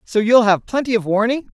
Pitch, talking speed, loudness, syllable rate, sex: 225 Hz, 235 wpm, -16 LUFS, 5.7 syllables/s, female